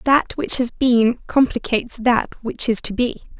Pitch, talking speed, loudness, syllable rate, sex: 245 Hz, 175 wpm, -19 LUFS, 4.6 syllables/s, female